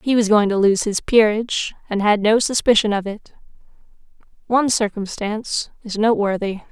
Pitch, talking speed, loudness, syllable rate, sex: 215 Hz, 150 wpm, -18 LUFS, 5.4 syllables/s, female